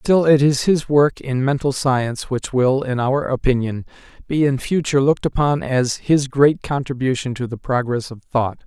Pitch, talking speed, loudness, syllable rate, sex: 135 Hz, 185 wpm, -19 LUFS, 4.8 syllables/s, male